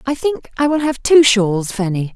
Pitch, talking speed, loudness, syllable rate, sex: 245 Hz, 225 wpm, -15 LUFS, 4.6 syllables/s, female